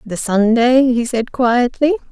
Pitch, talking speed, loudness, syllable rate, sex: 245 Hz, 140 wpm, -15 LUFS, 3.7 syllables/s, female